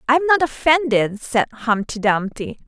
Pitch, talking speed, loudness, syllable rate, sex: 250 Hz, 135 wpm, -18 LUFS, 4.5 syllables/s, female